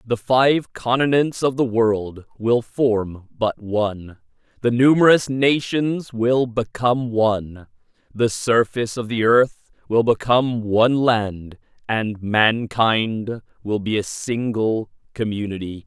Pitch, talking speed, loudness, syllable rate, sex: 115 Hz, 120 wpm, -20 LUFS, 3.7 syllables/s, male